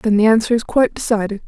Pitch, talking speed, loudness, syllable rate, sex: 220 Hz, 245 wpm, -16 LUFS, 7.1 syllables/s, female